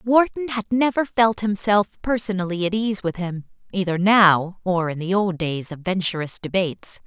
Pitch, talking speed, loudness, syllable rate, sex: 195 Hz, 170 wpm, -21 LUFS, 4.7 syllables/s, female